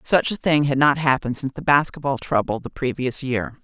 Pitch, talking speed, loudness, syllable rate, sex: 135 Hz, 215 wpm, -21 LUFS, 5.7 syllables/s, female